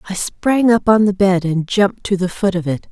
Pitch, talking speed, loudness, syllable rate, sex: 195 Hz, 270 wpm, -16 LUFS, 5.2 syllables/s, female